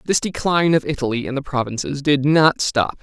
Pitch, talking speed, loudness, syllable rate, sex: 145 Hz, 200 wpm, -19 LUFS, 5.6 syllables/s, male